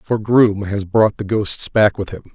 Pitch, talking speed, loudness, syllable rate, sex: 105 Hz, 230 wpm, -16 LUFS, 4.2 syllables/s, male